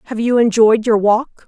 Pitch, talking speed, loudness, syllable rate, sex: 225 Hz, 205 wpm, -14 LUFS, 5.5 syllables/s, female